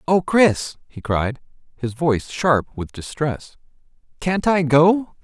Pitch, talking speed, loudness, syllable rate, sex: 150 Hz, 140 wpm, -20 LUFS, 3.5 syllables/s, male